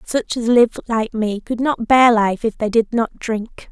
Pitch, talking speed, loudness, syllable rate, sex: 225 Hz, 225 wpm, -17 LUFS, 4.0 syllables/s, female